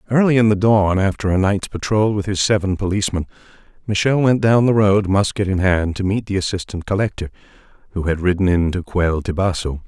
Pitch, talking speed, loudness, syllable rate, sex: 100 Hz, 195 wpm, -18 LUFS, 5.8 syllables/s, male